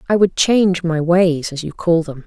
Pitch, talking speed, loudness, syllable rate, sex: 170 Hz, 240 wpm, -16 LUFS, 4.8 syllables/s, female